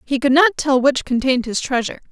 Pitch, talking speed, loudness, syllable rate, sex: 265 Hz, 225 wpm, -17 LUFS, 6.2 syllables/s, female